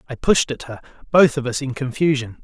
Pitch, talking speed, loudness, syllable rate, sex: 135 Hz, 220 wpm, -19 LUFS, 5.6 syllables/s, male